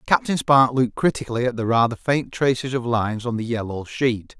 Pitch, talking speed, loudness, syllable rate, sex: 125 Hz, 205 wpm, -21 LUFS, 5.7 syllables/s, male